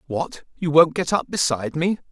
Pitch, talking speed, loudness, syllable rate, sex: 155 Hz, 170 wpm, -21 LUFS, 5.1 syllables/s, male